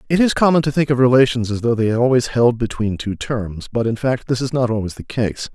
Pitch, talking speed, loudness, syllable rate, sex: 120 Hz, 260 wpm, -18 LUFS, 5.7 syllables/s, male